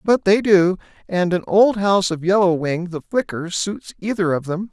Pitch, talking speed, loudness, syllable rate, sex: 185 Hz, 205 wpm, -19 LUFS, 4.7 syllables/s, male